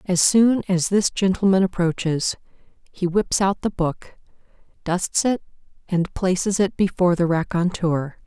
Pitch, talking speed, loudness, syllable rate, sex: 185 Hz, 140 wpm, -21 LUFS, 4.3 syllables/s, female